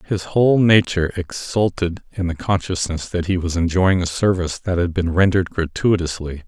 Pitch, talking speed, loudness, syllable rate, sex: 90 Hz, 165 wpm, -19 LUFS, 5.4 syllables/s, male